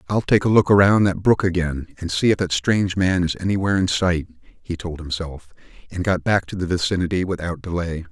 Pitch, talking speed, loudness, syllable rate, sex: 90 Hz, 215 wpm, -20 LUFS, 5.7 syllables/s, male